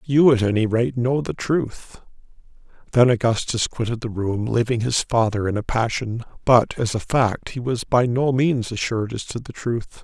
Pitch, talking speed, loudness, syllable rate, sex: 120 Hz, 190 wpm, -21 LUFS, 4.7 syllables/s, male